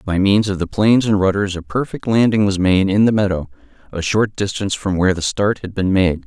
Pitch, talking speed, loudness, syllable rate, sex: 100 Hz, 240 wpm, -17 LUFS, 5.8 syllables/s, male